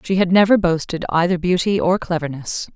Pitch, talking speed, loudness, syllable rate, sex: 175 Hz, 175 wpm, -18 LUFS, 5.5 syllables/s, female